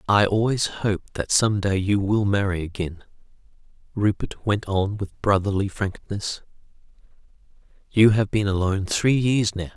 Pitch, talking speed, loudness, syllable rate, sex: 100 Hz, 140 wpm, -22 LUFS, 4.5 syllables/s, male